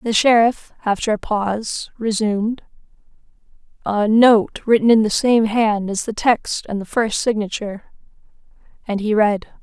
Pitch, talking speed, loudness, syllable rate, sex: 215 Hz, 145 wpm, -18 LUFS, 4.5 syllables/s, female